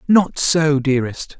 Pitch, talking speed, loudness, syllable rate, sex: 150 Hz, 130 wpm, -17 LUFS, 4.1 syllables/s, male